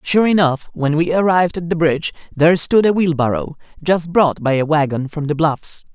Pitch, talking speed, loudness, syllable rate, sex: 160 Hz, 200 wpm, -16 LUFS, 5.3 syllables/s, male